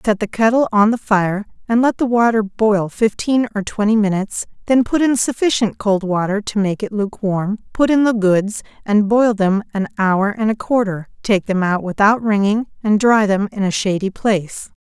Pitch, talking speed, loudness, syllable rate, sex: 210 Hz, 195 wpm, -17 LUFS, 4.9 syllables/s, female